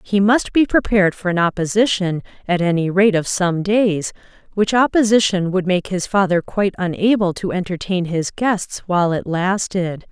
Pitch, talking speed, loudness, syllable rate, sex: 190 Hz, 165 wpm, -18 LUFS, 4.9 syllables/s, female